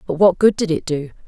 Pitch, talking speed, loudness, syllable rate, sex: 175 Hz, 285 wpm, -17 LUFS, 5.9 syllables/s, female